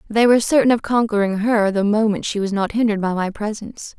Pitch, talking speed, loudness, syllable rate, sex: 215 Hz, 225 wpm, -18 LUFS, 6.3 syllables/s, female